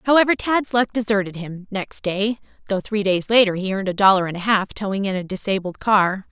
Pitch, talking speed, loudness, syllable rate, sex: 200 Hz, 220 wpm, -20 LUFS, 5.7 syllables/s, female